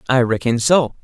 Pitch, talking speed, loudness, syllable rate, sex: 125 Hz, 175 wpm, -16 LUFS, 5.0 syllables/s, male